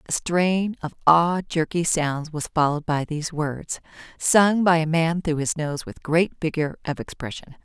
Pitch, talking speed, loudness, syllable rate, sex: 160 Hz, 180 wpm, -23 LUFS, 4.5 syllables/s, female